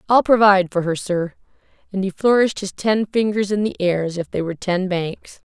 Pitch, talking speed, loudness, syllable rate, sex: 195 Hz, 220 wpm, -19 LUFS, 5.6 syllables/s, female